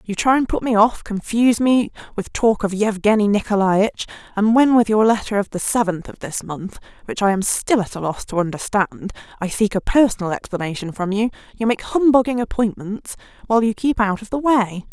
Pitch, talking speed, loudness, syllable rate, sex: 215 Hz, 205 wpm, -19 LUFS, 5.4 syllables/s, female